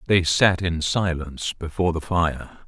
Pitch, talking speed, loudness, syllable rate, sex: 85 Hz, 155 wpm, -22 LUFS, 4.5 syllables/s, male